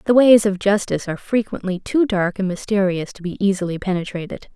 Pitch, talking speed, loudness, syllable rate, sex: 195 Hz, 185 wpm, -19 LUFS, 5.9 syllables/s, female